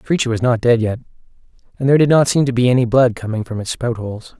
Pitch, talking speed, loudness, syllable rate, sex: 120 Hz, 275 wpm, -16 LUFS, 7.3 syllables/s, male